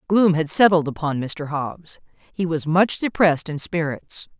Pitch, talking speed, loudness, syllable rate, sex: 165 Hz, 165 wpm, -20 LUFS, 4.4 syllables/s, female